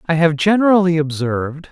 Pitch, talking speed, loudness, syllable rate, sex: 165 Hz, 140 wpm, -16 LUFS, 5.7 syllables/s, male